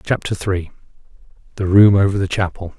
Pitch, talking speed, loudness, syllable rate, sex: 95 Hz, 130 wpm, -17 LUFS, 5.5 syllables/s, male